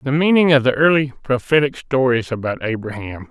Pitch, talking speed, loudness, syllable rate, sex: 130 Hz, 165 wpm, -17 LUFS, 5.4 syllables/s, male